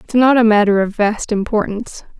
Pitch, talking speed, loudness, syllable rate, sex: 215 Hz, 190 wpm, -15 LUFS, 5.6 syllables/s, female